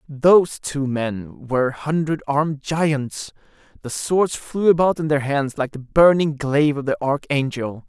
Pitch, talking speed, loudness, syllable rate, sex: 145 Hz, 170 wpm, -20 LUFS, 4.4 syllables/s, male